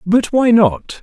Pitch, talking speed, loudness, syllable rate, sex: 210 Hz, 175 wpm, -13 LUFS, 3.3 syllables/s, male